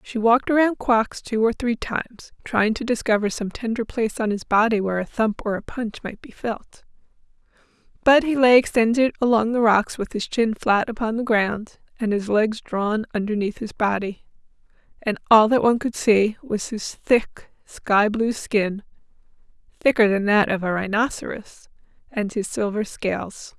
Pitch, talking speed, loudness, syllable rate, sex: 220 Hz, 170 wpm, -21 LUFS, 4.7 syllables/s, female